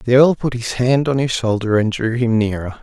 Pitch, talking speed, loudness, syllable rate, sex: 120 Hz, 255 wpm, -17 LUFS, 5.0 syllables/s, male